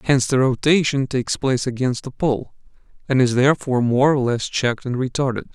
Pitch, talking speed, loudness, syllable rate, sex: 130 Hz, 185 wpm, -19 LUFS, 6.0 syllables/s, male